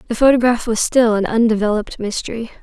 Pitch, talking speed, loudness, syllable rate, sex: 225 Hz, 160 wpm, -16 LUFS, 6.4 syllables/s, female